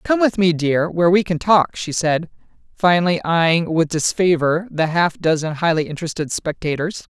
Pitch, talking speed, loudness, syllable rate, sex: 170 Hz, 170 wpm, -18 LUFS, 5.1 syllables/s, female